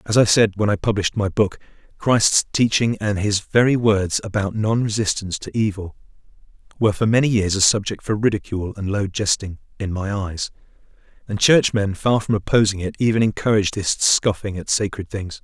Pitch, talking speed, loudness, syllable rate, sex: 105 Hz, 180 wpm, -20 LUFS, 5.5 syllables/s, male